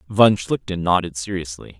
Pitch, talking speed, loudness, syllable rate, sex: 90 Hz, 135 wpm, -20 LUFS, 5.0 syllables/s, male